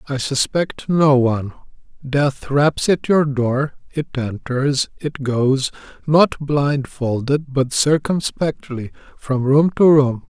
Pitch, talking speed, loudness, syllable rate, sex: 140 Hz, 110 wpm, -18 LUFS, 3.4 syllables/s, male